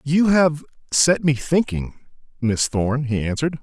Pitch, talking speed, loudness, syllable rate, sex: 140 Hz, 150 wpm, -20 LUFS, 4.3 syllables/s, male